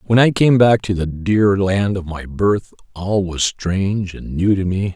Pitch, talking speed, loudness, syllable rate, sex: 95 Hz, 220 wpm, -17 LUFS, 4.2 syllables/s, male